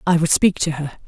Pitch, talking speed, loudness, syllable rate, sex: 160 Hz, 280 wpm, -18 LUFS, 6.1 syllables/s, female